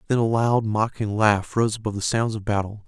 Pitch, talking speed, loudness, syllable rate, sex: 110 Hz, 230 wpm, -23 LUFS, 5.6 syllables/s, male